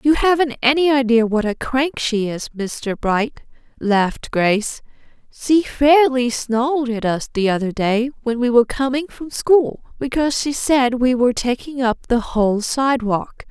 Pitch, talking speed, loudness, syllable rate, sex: 250 Hz, 165 wpm, -18 LUFS, 4.5 syllables/s, female